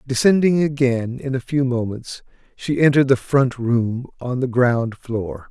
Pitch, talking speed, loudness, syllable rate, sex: 130 Hz, 165 wpm, -19 LUFS, 4.2 syllables/s, male